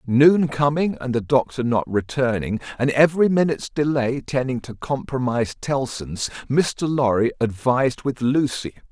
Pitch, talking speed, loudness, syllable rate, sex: 130 Hz, 135 wpm, -21 LUFS, 4.7 syllables/s, male